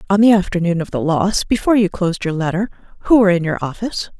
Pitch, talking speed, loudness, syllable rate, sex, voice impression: 190 Hz, 230 wpm, -17 LUFS, 7.0 syllables/s, female, very feminine, adult-like, slightly muffled, slightly fluent, sincere, slightly calm, elegant, slightly sweet